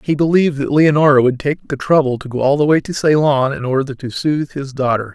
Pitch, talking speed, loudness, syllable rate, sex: 140 Hz, 245 wpm, -15 LUFS, 5.9 syllables/s, male